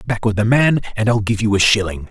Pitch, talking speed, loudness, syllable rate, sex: 110 Hz, 315 wpm, -16 LUFS, 6.4 syllables/s, male